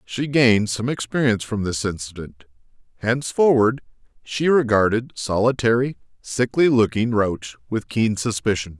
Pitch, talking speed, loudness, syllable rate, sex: 115 Hz, 115 wpm, -20 LUFS, 4.8 syllables/s, male